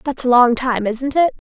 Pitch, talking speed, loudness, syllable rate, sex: 255 Hz, 240 wpm, -16 LUFS, 5.0 syllables/s, female